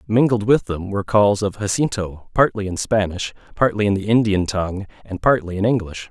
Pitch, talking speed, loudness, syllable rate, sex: 105 Hz, 185 wpm, -19 LUFS, 5.4 syllables/s, male